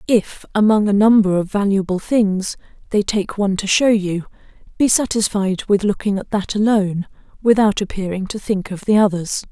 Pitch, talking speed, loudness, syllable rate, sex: 200 Hz, 170 wpm, -18 LUFS, 5.2 syllables/s, female